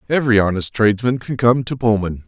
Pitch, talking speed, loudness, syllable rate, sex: 110 Hz, 185 wpm, -17 LUFS, 6.2 syllables/s, male